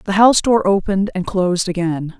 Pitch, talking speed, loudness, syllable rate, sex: 190 Hz, 190 wpm, -16 LUFS, 5.7 syllables/s, female